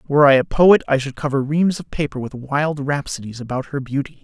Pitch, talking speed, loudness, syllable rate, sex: 140 Hz, 225 wpm, -19 LUFS, 5.6 syllables/s, male